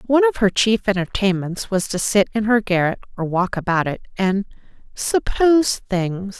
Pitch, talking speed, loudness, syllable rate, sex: 205 Hz, 170 wpm, -19 LUFS, 4.9 syllables/s, female